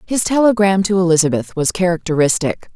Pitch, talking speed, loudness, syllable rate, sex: 185 Hz, 130 wpm, -15 LUFS, 5.8 syllables/s, female